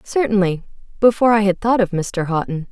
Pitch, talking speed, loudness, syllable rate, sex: 200 Hz, 155 wpm, -17 LUFS, 5.8 syllables/s, female